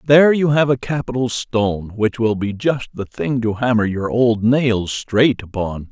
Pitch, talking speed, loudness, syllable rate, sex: 115 Hz, 195 wpm, -18 LUFS, 4.5 syllables/s, male